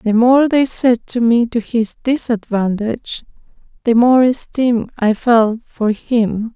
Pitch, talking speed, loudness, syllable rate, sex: 235 Hz, 145 wpm, -15 LUFS, 3.6 syllables/s, female